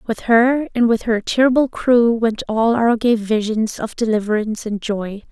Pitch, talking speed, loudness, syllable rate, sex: 230 Hz, 180 wpm, -17 LUFS, 4.6 syllables/s, female